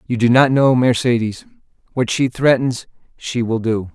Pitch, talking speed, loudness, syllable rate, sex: 120 Hz, 165 wpm, -16 LUFS, 4.6 syllables/s, male